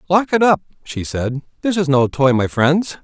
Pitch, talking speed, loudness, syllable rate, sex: 155 Hz, 215 wpm, -17 LUFS, 4.6 syllables/s, male